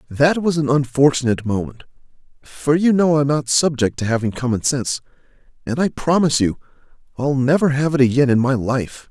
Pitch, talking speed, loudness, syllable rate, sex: 135 Hz, 180 wpm, -18 LUFS, 5.8 syllables/s, male